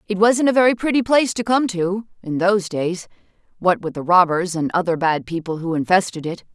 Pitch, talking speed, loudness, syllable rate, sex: 190 Hz, 210 wpm, -19 LUFS, 5.6 syllables/s, female